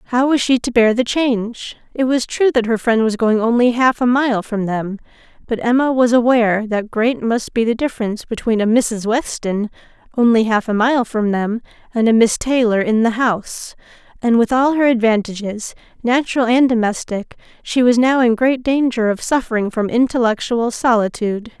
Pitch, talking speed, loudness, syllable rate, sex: 235 Hz, 185 wpm, -16 LUFS, 5.1 syllables/s, female